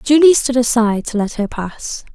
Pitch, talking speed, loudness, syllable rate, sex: 240 Hz, 195 wpm, -15 LUFS, 5.0 syllables/s, female